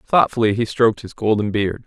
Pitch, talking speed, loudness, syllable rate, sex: 110 Hz, 195 wpm, -19 LUFS, 5.5 syllables/s, male